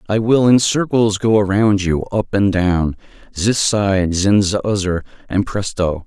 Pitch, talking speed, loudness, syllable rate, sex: 100 Hz, 170 wpm, -16 LUFS, 4.1 syllables/s, male